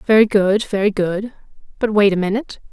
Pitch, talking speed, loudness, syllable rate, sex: 205 Hz, 175 wpm, -17 LUFS, 5.5 syllables/s, female